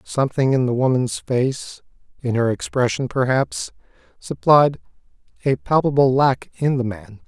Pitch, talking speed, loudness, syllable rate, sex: 130 Hz, 130 wpm, -19 LUFS, 4.4 syllables/s, male